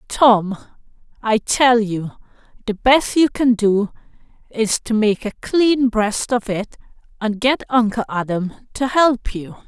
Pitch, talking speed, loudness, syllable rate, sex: 225 Hz, 150 wpm, -18 LUFS, 3.8 syllables/s, female